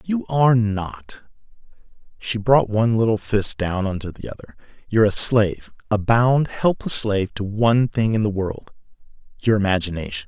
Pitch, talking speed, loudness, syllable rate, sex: 105 Hz, 160 wpm, -20 LUFS, 5.1 syllables/s, male